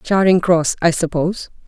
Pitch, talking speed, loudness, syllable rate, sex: 175 Hz, 145 wpm, -16 LUFS, 5.1 syllables/s, female